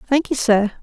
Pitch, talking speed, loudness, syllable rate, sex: 245 Hz, 215 wpm, -18 LUFS, 4.8 syllables/s, female